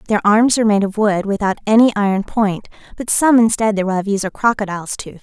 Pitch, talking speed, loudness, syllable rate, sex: 210 Hz, 205 wpm, -16 LUFS, 5.9 syllables/s, female